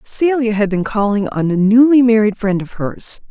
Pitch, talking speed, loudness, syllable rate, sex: 215 Hz, 200 wpm, -14 LUFS, 4.8 syllables/s, female